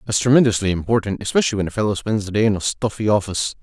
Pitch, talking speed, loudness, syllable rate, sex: 105 Hz, 230 wpm, -19 LUFS, 7.6 syllables/s, male